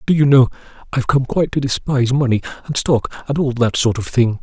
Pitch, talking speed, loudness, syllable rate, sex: 130 Hz, 230 wpm, -17 LUFS, 6.4 syllables/s, male